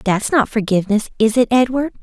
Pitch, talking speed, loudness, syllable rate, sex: 225 Hz, 175 wpm, -16 LUFS, 5.8 syllables/s, female